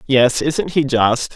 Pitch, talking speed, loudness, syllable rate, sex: 140 Hz, 180 wpm, -16 LUFS, 3.3 syllables/s, male